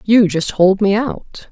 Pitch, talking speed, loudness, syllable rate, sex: 200 Hz, 200 wpm, -15 LUFS, 4.3 syllables/s, female